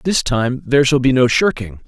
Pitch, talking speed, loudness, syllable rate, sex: 130 Hz, 225 wpm, -15 LUFS, 5.3 syllables/s, male